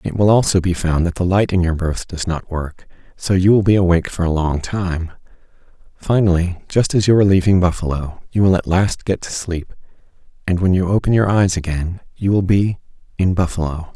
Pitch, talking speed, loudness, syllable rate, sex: 90 Hz, 205 wpm, -17 LUFS, 5.5 syllables/s, male